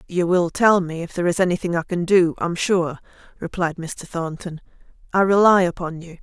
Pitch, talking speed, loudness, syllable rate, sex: 175 Hz, 195 wpm, -20 LUFS, 5.1 syllables/s, female